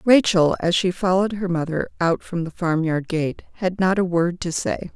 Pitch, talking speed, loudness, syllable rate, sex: 175 Hz, 205 wpm, -21 LUFS, 4.9 syllables/s, female